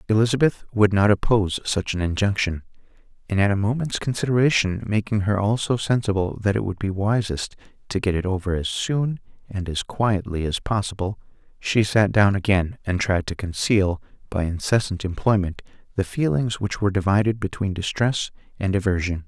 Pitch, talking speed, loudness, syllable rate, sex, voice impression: 100 Hz, 155 wpm, -22 LUFS, 5.3 syllables/s, male, masculine, adult-like, tensed, slightly weak, bright, soft, clear, cool, intellectual, sincere, calm, friendly, reassuring, wild, slightly lively, kind